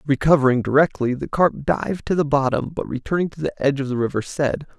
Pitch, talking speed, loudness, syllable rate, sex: 140 Hz, 215 wpm, -20 LUFS, 6.3 syllables/s, male